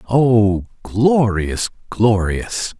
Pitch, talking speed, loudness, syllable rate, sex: 110 Hz, 65 wpm, -17 LUFS, 2.2 syllables/s, male